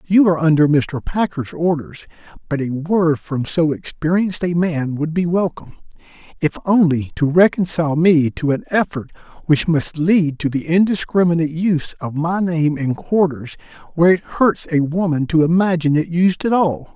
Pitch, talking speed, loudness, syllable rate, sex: 160 Hz, 170 wpm, -17 LUFS, 5.0 syllables/s, male